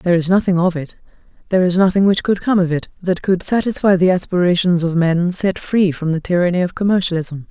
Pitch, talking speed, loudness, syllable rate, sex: 180 Hz, 210 wpm, -16 LUFS, 6.0 syllables/s, female